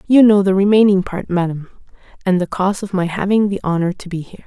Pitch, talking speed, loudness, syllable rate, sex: 190 Hz, 230 wpm, -16 LUFS, 6.4 syllables/s, female